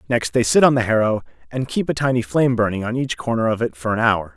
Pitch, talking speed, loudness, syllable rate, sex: 115 Hz, 275 wpm, -19 LUFS, 6.4 syllables/s, male